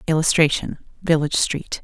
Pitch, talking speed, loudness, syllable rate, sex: 160 Hz, 100 wpm, -19 LUFS, 1.8 syllables/s, female